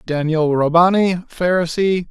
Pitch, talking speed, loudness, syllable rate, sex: 170 Hz, 85 wpm, -16 LUFS, 4.0 syllables/s, male